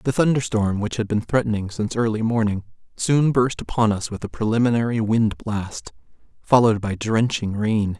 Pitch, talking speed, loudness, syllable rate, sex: 110 Hz, 175 wpm, -21 LUFS, 5.2 syllables/s, male